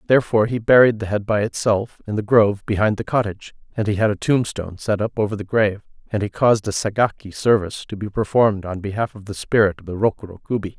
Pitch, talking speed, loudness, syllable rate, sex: 105 Hz, 230 wpm, -20 LUFS, 6.6 syllables/s, male